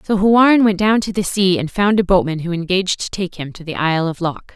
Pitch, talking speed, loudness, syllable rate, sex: 185 Hz, 275 wpm, -16 LUFS, 5.6 syllables/s, female